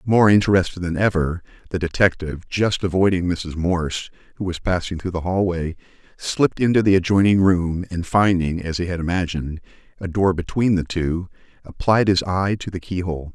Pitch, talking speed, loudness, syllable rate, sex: 90 Hz, 170 wpm, -20 LUFS, 5.4 syllables/s, male